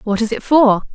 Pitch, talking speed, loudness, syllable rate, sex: 230 Hz, 255 wpm, -14 LUFS, 5.3 syllables/s, female